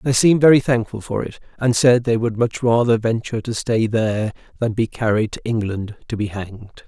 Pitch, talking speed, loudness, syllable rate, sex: 115 Hz, 210 wpm, -19 LUFS, 5.7 syllables/s, male